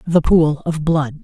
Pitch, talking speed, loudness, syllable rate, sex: 155 Hz, 195 wpm, -16 LUFS, 3.8 syllables/s, female